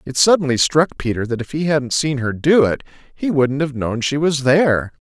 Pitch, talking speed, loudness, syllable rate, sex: 140 Hz, 225 wpm, -17 LUFS, 5.1 syllables/s, male